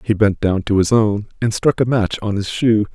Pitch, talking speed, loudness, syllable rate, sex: 105 Hz, 265 wpm, -17 LUFS, 5.0 syllables/s, male